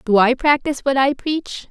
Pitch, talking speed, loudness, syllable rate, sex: 270 Hz, 210 wpm, -18 LUFS, 5.0 syllables/s, female